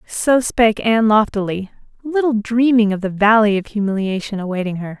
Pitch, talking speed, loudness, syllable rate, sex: 215 Hz, 155 wpm, -17 LUFS, 5.5 syllables/s, female